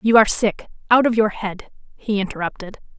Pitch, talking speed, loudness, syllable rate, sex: 210 Hz, 160 wpm, -19 LUFS, 5.8 syllables/s, female